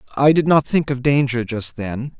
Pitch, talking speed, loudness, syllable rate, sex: 130 Hz, 220 wpm, -18 LUFS, 4.9 syllables/s, male